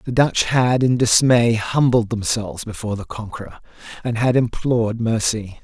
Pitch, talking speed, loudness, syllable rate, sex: 115 Hz, 150 wpm, -19 LUFS, 5.0 syllables/s, male